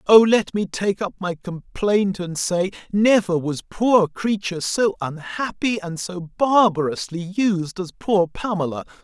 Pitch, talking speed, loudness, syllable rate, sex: 190 Hz, 145 wpm, -21 LUFS, 4.0 syllables/s, male